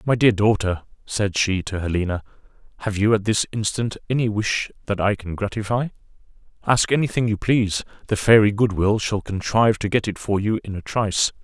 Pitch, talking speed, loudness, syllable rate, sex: 105 Hz, 185 wpm, -21 LUFS, 5.5 syllables/s, male